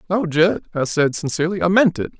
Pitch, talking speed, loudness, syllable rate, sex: 170 Hz, 220 wpm, -18 LUFS, 6.0 syllables/s, male